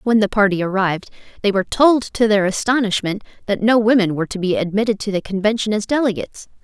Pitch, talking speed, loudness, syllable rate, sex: 210 Hz, 200 wpm, -18 LUFS, 6.5 syllables/s, female